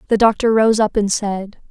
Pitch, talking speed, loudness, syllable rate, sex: 210 Hz, 210 wpm, -16 LUFS, 4.9 syllables/s, female